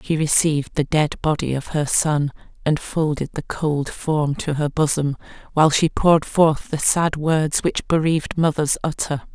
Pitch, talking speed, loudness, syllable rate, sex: 155 Hz, 175 wpm, -20 LUFS, 4.5 syllables/s, female